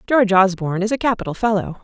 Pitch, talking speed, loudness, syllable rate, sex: 205 Hz, 195 wpm, -18 LUFS, 7.2 syllables/s, female